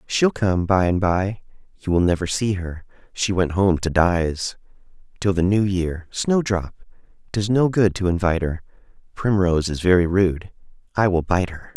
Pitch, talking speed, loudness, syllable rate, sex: 95 Hz, 175 wpm, -21 LUFS, 4.6 syllables/s, male